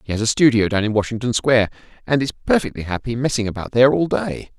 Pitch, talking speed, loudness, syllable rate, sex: 120 Hz, 220 wpm, -19 LUFS, 6.7 syllables/s, male